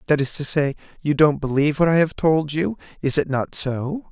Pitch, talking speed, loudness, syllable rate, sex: 145 Hz, 235 wpm, -21 LUFS, 5.2 syllables/s, male